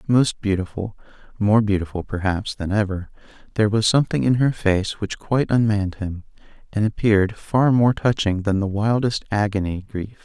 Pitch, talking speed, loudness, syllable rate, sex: 105 Hz, 150 wpm, -21 LUFS, 5.3 syllables/s, male